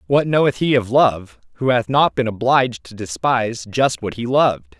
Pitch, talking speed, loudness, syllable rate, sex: 120 Hz, 200 wpm, -18 LUFS, 5.0 syllables/s, male